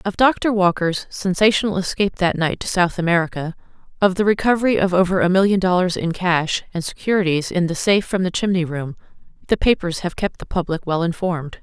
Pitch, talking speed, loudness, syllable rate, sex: 180 Hz, 185 wpm, -19 LUFS, 6.0 syllables/s, female